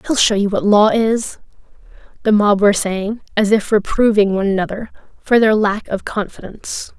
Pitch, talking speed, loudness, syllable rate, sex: 210 Hz, 170 wpm, -16 LUFS, 5.2 syllables/s, female